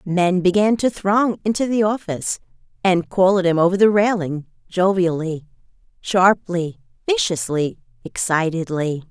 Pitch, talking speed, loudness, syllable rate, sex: 185 Hz, 120 wpm, -19 LUFS, 4.5 syllables/s, female